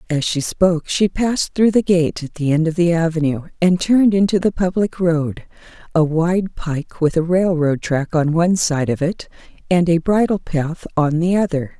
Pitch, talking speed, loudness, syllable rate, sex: 170 Hz, 200 wpm, -18 LUFS, 4.8 syllables/s, female